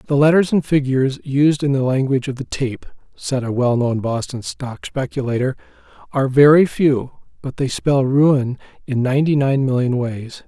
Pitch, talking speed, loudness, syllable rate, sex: 135 Hz, 165 wpm, -18 LUFS, 4.9 syllables/s, male